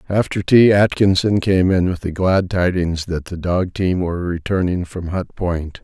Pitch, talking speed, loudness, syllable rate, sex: 90 Hz, 185 wpm, -18 LUFS, 4.5 syllables/s, male